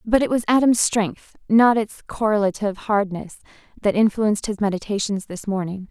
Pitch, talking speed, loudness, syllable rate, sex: 210 Hz, 150 wpm, -21 LUFS, 5.3 syllables/s, female